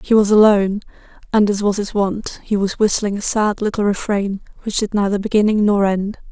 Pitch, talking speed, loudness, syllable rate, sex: 205 Hz, 200 wpm, -17 LUFS, 5.4 syllables/s, female